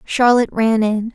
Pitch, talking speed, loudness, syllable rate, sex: 225 Hz, 155 wpm, -16 LUFS, 4.8 syllables/s, female